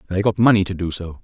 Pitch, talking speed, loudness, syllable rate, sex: 95 Hz, 290 wpm, -18 LUFS, 6.9 syllables/s, male